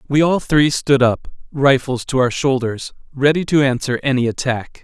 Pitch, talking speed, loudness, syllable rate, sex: 135 Hz, 175 wpm, -17 LUFS, 4.7 syllables/s, male